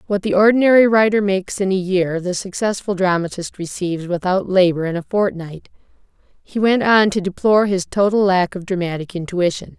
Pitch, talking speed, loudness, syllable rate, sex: 190 Hz, 170 wpm, -17 LUFS, 5.5 syllables/s, female